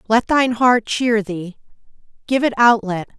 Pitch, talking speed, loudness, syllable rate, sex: 225 Hz, 170 wpm, -17 LUFS, 4.5 syllables/s, female